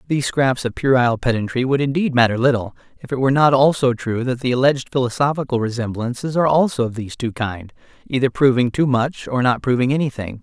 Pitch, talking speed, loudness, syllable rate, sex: 130 Hz, 195 wpm, -18 LUFS, 6.3 syllables/s, male